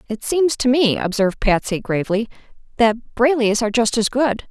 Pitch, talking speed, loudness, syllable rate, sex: 235 Hz, 175 wpm, -18 LUFS, 5.5 syllables/s, female